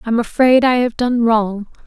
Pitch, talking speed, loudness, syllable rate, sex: 235 Hz, 195 wpm, -15 LUFS, 4.4 syllables/s, female